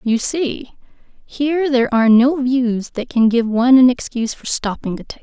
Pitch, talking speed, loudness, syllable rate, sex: 250 Hz, 205 wpm, -16 LUFS, 5.4 syllables/s, female